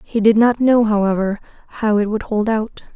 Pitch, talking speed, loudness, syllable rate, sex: 220 Hz, 205 wpm, -17 LUFS, 5.2 syllables/s, female